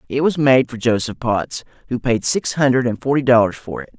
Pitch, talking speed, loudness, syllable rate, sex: 125 Hz, 225 wpm, -17 LUFS, 5.4 syllables/s, male